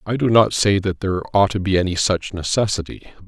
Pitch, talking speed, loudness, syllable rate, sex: 100 Hz, 220 wpm, -19 LUFS, 5.7 syllables/s, male